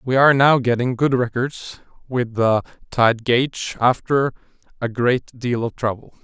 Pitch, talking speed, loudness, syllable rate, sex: 125 Hz, 155 wpm, -19 LUFS, 4.5 syllables/s, male